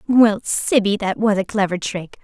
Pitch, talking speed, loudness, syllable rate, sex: 205 Hz, 190 wpm, -18 LUFS, 4.4 syllables/s, female